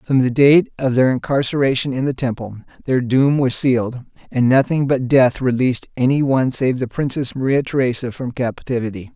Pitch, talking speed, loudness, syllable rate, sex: 130 Hz, 175 wpm, -18 LUFS, 5.4 syllables/s, male